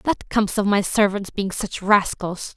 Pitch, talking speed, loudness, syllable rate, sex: 200 Hz, 190 wpm, -21 LUFS, 4.4 syllables/s, female